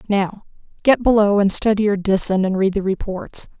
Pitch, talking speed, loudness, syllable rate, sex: 200 Hz, 185 wpm, -18 LUFS, 5.0 syllables/s, female